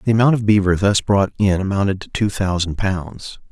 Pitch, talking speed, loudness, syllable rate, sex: 100 Hz, 205 wpm, -18 LUFS, 5.3 syllables/s, male